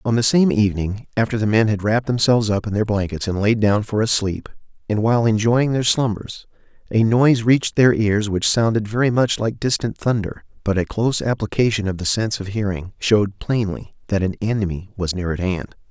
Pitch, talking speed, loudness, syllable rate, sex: 105 Hz, 205 wpm, -19 LUFS, 5.7 syllables/s, male